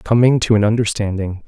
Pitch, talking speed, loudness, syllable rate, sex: 110 Hz, 165 wpm, -16 LUFS, 5.6 syllables/s, male